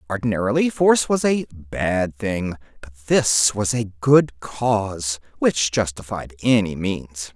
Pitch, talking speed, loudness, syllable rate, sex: 110 Hz, 130 wpm, -20 LUFS, 4.0 syllables/s, male